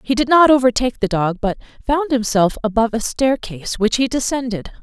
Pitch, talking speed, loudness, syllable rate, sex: 240 Hz, 185 wpm, -17 LUFS, 5.9 syllables/s, female